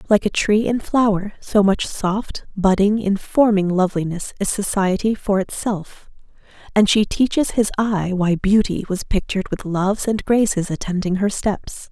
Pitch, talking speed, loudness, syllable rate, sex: 200 Hz, 155 wpm, -19 LUFS, 4.6 syllables/s, female